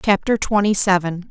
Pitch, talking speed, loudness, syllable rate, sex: 195 Hz, 140 wpm, -18 LUFS, 5.0 syllables/s, female